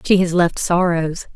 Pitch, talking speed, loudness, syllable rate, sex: 175 Hz, 175 wpm, -17 LUFS, 4.1 syllables/s, female